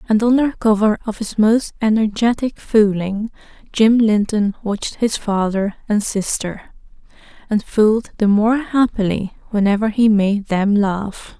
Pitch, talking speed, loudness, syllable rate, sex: 215 Hz, 130 wpm, -17 LUFS, 4.2 syllables/s, female